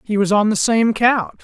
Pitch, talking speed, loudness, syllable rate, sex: 215 Hz, 250 wpm, -16 LUFS, 4.7 syllables/s, male